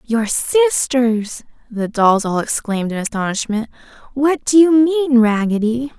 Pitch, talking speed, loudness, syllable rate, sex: 245 Hz, 130 wpm, -16 LUFS, 4.1 syllables/s, female